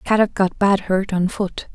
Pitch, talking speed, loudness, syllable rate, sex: 195 Hz, 205 wpm, -19 LUFS, 4.4 syllables/s, female